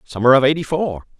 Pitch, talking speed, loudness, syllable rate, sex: 135 Hz, 200 wpm, -16 LUFS, 6.0 syllables/s, male